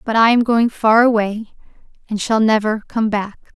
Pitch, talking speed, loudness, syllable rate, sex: 220 Hz, 185 wpm, -16 LUFS, 5.1 syllables/s, female